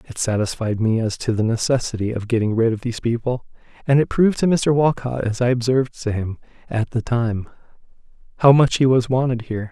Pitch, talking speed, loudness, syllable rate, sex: 120 Hz, 205 wpm, -20 LUFS, 5.9 syllables/s, male